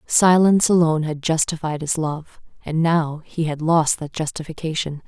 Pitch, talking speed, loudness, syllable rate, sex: 160 Hz, 155 wpm, -20 LUFS, 4.9 syllables/s, female